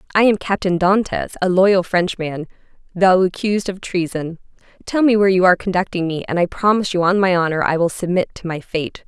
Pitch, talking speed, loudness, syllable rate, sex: 185 Hz, 205 wpm, -17 LUFS, 5.8 syllables/s, female